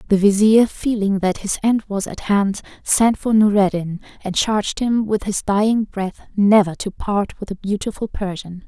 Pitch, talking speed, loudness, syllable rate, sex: 205 Hz, 180 wpm, -19 LUFS, 4.6 syllables/s, female